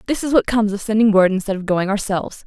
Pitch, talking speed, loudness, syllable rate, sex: 210 Hz, 270 wpm, -18 LUFS, 7.0 syllables/s, female